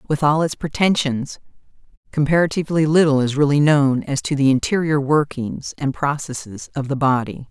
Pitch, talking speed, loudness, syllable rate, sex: 145 Hz, 150 wpm, -19 LUFS, 5.1 syllables/s, female